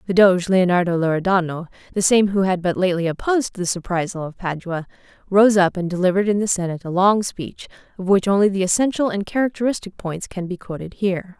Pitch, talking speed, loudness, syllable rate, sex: 190 Hz, 195 wpm, -20 LUFS, 6.3 syllables/s, female